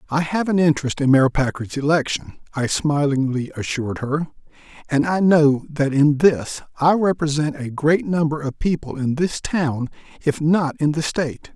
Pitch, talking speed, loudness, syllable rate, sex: 150 Hz, 170 wpm, -20 LUFS, 4.8 syllables/s, male